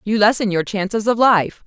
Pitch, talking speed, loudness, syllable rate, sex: 210 Hz, 215 wpm, -17 LUFS, 5.1 syllables/s, female